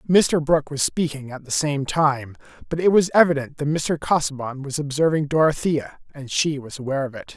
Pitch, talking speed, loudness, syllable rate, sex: 145 Hz, 195 wpm, -21 LUFS, 5.4 syllables/s, male